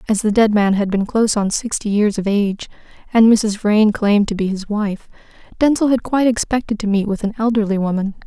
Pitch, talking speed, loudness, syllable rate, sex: 210 Hz, 220 wpm, -17 LUFS, 5.8 syllables/s, female